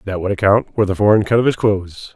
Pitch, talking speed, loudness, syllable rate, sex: 100 Hz, 280 wpm, -16 LUFS, 6.7 syllables/s, male